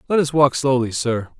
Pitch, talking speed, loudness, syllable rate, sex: 135 Hz, 215 wpm, -18 LUFS, 5.2 syllables/s, male